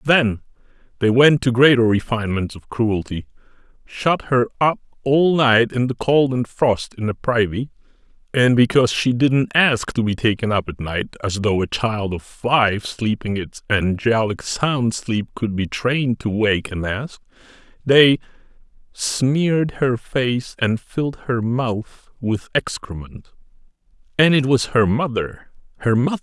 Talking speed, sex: 155 wpm, male